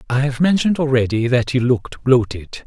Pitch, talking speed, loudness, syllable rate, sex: 130 Hz, 180 wpm, -17 LUFS, 5.6 syllables/s, male